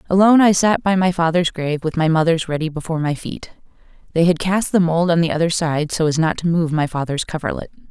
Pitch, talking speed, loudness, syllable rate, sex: 165 Hz, 235 wpm, -18 LUFS, 6.2 syllables/s, female